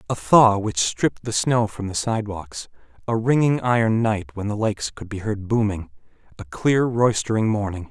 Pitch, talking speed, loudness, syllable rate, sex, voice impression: 105 Hz, 180 wpm, -21 LUFS, 5.0 syllables/s, male, masculine, adult-like, cool, refreshing, sincere